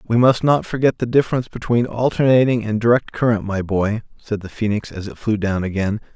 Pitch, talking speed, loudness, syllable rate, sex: 110 Hz, 205 wpm, -19 LUFS, 5.8 syllables/s, male